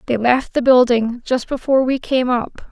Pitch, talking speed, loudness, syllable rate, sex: 250 Hz, 200 wpm, -17 LUFS, 4.8 syllables/s, female